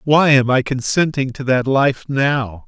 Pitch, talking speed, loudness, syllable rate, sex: 135 Hz, 180 wpm, -16 LUFS, 3.9 syllables/s, male